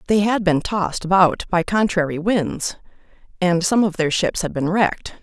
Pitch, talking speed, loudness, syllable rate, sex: 180 Hz, 185 wpm, -19 LUFS, 4.8 syllables/s, female